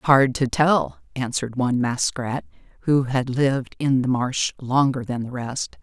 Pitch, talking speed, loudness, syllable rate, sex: 125 Hz, 165 wpm, -22 LUFS, 4.3 syllables/s, female